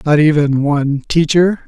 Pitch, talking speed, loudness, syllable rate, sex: 150 Hz, 145 wpm, -14 LUFS, 4.5 syllables/s, male